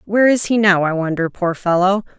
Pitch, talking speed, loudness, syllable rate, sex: 190 Hz, 220 wpm, -16 LUFS, 5.7 syllables/s, female